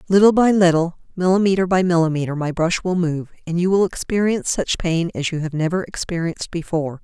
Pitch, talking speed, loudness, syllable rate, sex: 175 Hz, 190 wpm, -19 LUFS, 6.0 syllables/s, female